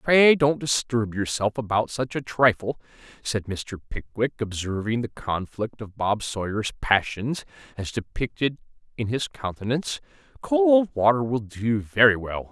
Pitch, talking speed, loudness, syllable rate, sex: 120 Hz, 140 wpm, -24 LUFS, 4.3 syllables/s, male